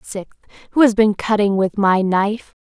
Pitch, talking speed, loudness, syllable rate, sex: 205 Hz, 205 wpm, -17 LUFS, 5.1 syllables/s, female